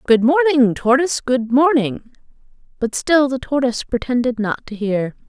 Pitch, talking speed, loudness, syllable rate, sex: 250 Hz, 150 wpm, -17 LUFS, 4.9 syllables/s, female